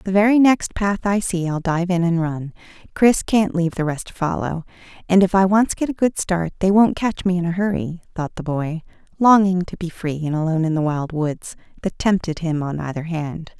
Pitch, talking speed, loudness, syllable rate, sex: 175 Hz, 230 wpm, -20 LUFS, 5.2 syllables/s, female